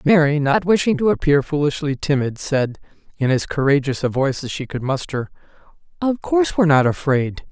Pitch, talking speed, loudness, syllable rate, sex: 145 Hz, 175 wpm, -19 LUFS, 5.5 syllables/s, male